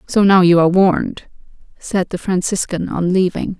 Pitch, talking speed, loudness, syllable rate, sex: 180 Hz, 165 wpm, -15 LUFS, 5.1 syllables/s, female